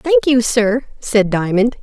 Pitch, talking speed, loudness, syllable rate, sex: 220 Hz, 165 wpm, -15 LUFS, 3.8 syllables/s, female